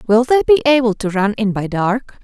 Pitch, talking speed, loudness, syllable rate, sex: 230 Hz, 240 wpm, -15 LUFS, 5.2 syllables/s, female